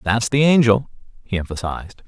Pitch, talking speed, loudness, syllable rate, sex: 115 Hz, 145 wpm, -18 LUFS, 5.5 syllables/s, male